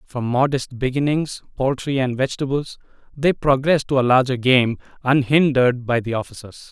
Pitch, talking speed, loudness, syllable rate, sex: 130 Hz, 115 wpm, -19 LUFS, 5.1 syllables/s, male